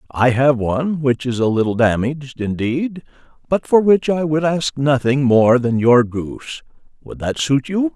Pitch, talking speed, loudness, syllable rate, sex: 135 Hz, 180 wpm, -17 LUFS, 4.5 syllables/s, male